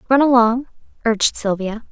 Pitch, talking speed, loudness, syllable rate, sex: 235 Hz, 125 wpm, -17 LUFS, 5.4 syllables/s, female